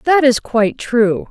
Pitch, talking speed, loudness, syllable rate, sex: 240 Hz, 185 wpm, -15 LUFS, 4.2 syllables/s, female